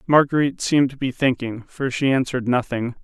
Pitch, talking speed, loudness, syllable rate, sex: 130 Hz, 180 wpm, -21 LUFS, 6.0 syllables/s, male